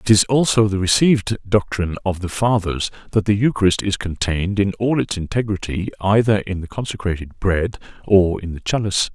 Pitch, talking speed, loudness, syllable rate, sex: 100 Hz, 175 wpm, -19 LUFS, 5.5 syllables/s, male